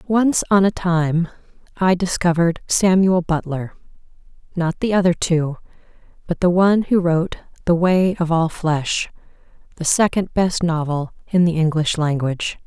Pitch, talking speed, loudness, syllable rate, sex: 170 Hz, 140 wpm, -19 LUFS, 4.6 syllables/s, female